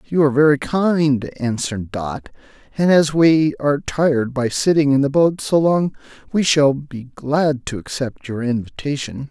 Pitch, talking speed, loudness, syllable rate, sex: 140 Hz, 170 wpm, -18 LUFS, 4.4 syllables/s, male